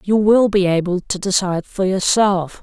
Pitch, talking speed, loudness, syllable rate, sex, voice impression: 190 Hz, 185 wpm, -17 LUFS, 4.7 syllables/s, male, very masculine, slightly middle-aged, slightly thick, sincere, calm